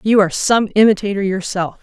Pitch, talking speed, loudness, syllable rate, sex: 200 Hz, 165 wpm, -15 LUFS, 5.8 syllables/s, female